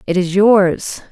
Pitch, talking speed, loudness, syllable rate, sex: 190 Hz, 160 wpm, -13 LUFS, 3.3 syllables/s, female